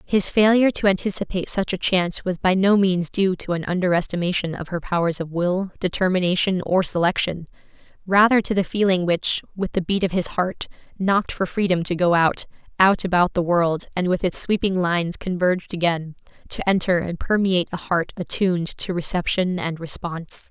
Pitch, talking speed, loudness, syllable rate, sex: 180 Hz, 185 wpm, -21 LUFS, 5.4 syllables/s, female